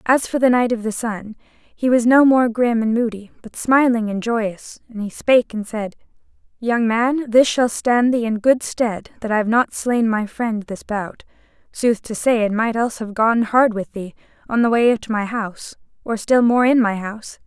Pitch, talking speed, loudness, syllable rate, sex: 230 Hz, 220 wpm, -18 LUFS, 4.6 syllables/s, female